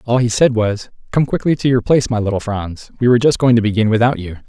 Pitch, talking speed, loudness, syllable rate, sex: 115 Hz, 270 wpm, -16 LUFS, 6.5 syllables/s, male